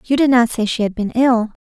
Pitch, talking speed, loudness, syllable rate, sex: 235 Hz, 295 wpm, -16 LUFS, 5.5 syllables/s, female